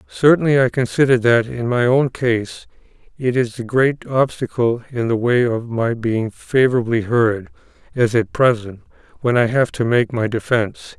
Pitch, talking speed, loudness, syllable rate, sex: 120 Hz, 170 wpm, -18 LUFS, 4.5 syllables/s, male